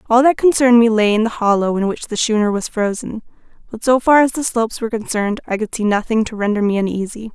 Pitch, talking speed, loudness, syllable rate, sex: 225 Hz, 245 wpm, -16 LUFS, 6.5 syllables/s, female